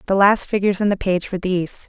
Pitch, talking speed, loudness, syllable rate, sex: 195 Hz, 255 wpm, -19 LUFS, 7.5 syllables/s, female